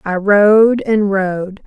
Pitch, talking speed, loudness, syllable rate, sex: 200 Hz, 145 wpm, -13 LUFS, 2.6 syllables/s, female